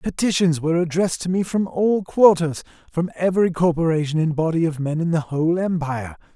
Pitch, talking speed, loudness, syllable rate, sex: 170 Hz, 180 wpm, -20 LUFS, 5.9 syllables/s, male